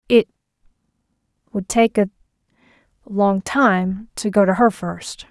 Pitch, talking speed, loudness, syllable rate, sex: 205 Hz, 100 wpm, -19 LUFS, 3.8 syllables/s, female